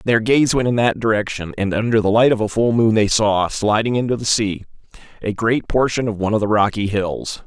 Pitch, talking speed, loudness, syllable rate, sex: 110 Hz, 235 wpm, -18 LUFS, 5.5 syllables/s, male